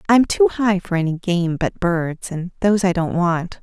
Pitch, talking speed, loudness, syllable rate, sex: 180 Hz, 215 wpm, -19 LUFS, 4.5 syllables/s, female